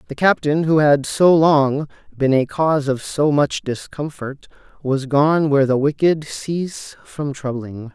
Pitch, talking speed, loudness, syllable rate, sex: 145 Hz, 160 wpm, -18 LUFS, 4.1 syllables/s, male